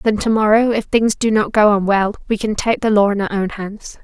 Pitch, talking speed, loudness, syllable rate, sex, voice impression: 210 Hz, 270 wpm, -16 LUFS, 5.2 syllables/s, female, feminine, slightly gender-neutral, young, slightly adult-like, thin, slightly relaxed, slightly powerful, bright, slightly soft, slightly muffled, fluent, cute, intellectual, sincere, calm, friendly, slightly reassuring, unique, elegant, slightly sweet, lively, slightly strict, slightly sharp, slightly modest